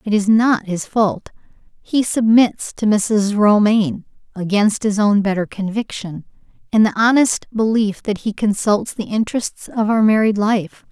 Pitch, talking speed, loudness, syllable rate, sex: 210 Hz, 145 wpm, -17 LUFS, 4.3 syllables/s, female